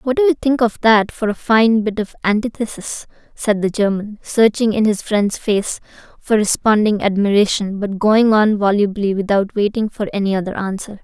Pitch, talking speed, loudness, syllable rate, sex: 210 Hz, 180 wpm, -17 LUFS, 4.9 syllables/s, female